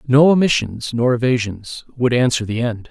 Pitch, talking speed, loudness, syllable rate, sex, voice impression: 125 Hz, 165 wpm, -17 LUFS, 4.8 syllables/s, male, masculine, middle-aged, tensed, powerful, muffled, slightly raspy, mature, slightly friendly, wild, lively, slightly strict, slightly sharp